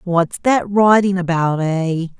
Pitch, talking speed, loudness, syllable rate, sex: 180 Hz, 135 wpm, -16 LUFS, 3.7 syllables/s, female